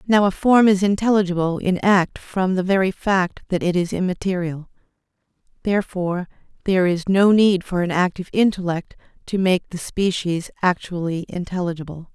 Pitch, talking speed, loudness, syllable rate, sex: 185 Hz, 150 wpm, -20 LUFS, 5.2 syllables/s, female